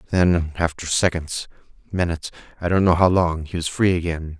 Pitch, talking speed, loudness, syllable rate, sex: 85 Hz, 135 wpm, -21 LUFS, 5.3 syllables/s, male